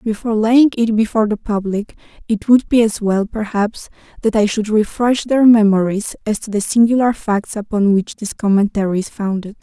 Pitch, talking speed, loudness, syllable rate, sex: 215 Hz, 180 wpm, -16 LUFS, 5.1 syllables/s, female